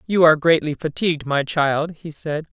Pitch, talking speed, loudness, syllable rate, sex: 155 Hz, 185 wpm, -19 LUFS, 5.2 syllables/s, female